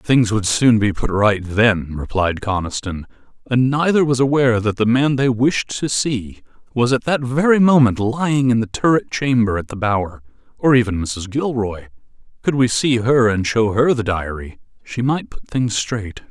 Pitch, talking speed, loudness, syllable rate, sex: 115 Hz, 190 wpm, -18 LUFS, 4.6 syllables/s, male